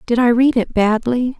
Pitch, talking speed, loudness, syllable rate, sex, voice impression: 240 Hz, 215 wpm, -16 LUFS, 4.7 syllables/s, female, very feminine, adult-like, slightly middle-aged, slightly thin, slightly relaxed, slightly weak, slightly bright, soft, clear, fluent, cool, very intellectual, slightly refreshing, very sincere, very calm, friendly, very reassuring, unique, elegant, slightly sweet, very kind, slightly sharp